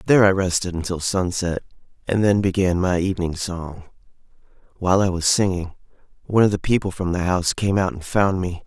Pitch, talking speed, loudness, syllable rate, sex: 90 Hz, 185 wpm, -21 LUFS, 5.9 syllables/s, male